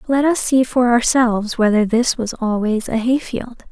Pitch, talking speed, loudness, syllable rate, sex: 240 Hz, 195 wpm, -17 LUFS, 4.9 syllables/s, female